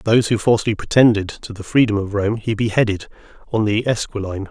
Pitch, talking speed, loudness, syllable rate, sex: 105 Hz, 185 wpm, -18 LUFS, 6.4 syllables/s, male